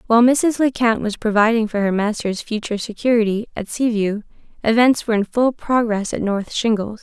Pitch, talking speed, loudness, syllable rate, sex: 225 Hz, 180 wpm, -19 LUFS, 5.5 syllables/s, female